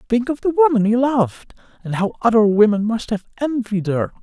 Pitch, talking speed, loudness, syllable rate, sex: 230 Hz, 200 wpm, -18 LUFS, 5.5 syllables/s, male